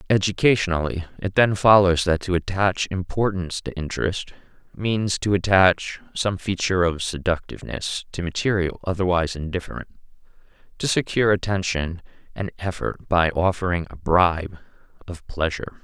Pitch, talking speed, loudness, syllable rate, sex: 90 Hz, 120 wpm, -22 LUFS, 5.3 syllables/s, male